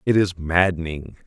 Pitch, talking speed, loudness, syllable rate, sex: 85 Hz, 140 wpm, -21 LUFS, 4.6 syllables/s, male